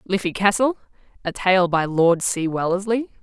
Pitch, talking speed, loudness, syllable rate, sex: 190 Hz, 150 wpm, -20 LUFS, 4.6 syllables/s, female